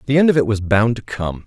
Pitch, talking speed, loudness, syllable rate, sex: 115 Hz, 325 wpm, -17 LUFS, 6.1 syllables/s, male